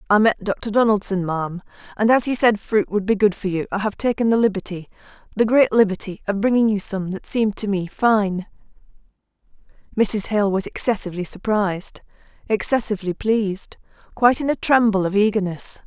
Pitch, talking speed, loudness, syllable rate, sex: 205 Hz, 165 wpm, -20 LUFS, 5.7 syllables/s, female